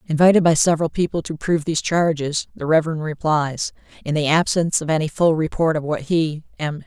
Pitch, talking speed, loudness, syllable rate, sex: 155 Hz, 190 wpm, -20 LUFS, 6.0 syllables/s, female